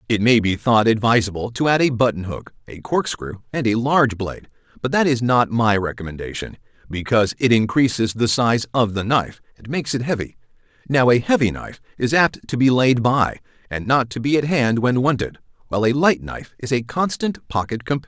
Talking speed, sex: 205 wpm, male